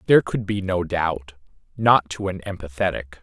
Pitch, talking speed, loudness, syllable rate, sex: 90 Hz, 170 wpm, -22 LUFS, 5.2 syllables/s, male